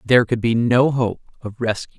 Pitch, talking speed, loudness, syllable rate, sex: 120 Hz, 210 wpm, -19 LUFS, 5.3 syllables/s, male